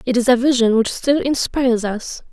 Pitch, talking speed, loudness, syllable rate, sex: 250 Hz, 205 wpm, -17 LUFS, 5.1 syllables/s, female